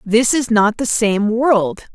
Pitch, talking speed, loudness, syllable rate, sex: 230 Hz, 185 wpm, -16 LUFS, 3.5 syllables/s, female